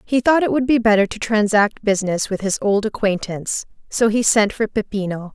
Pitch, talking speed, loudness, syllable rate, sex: 215 Hz, 200 wpm, -18 LUFS, 5.4 syllables/s, female